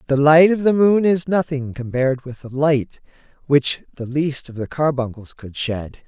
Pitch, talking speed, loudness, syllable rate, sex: 145 Hz, 190 wpm, -19 LUFS, 4.6 syllables/s, female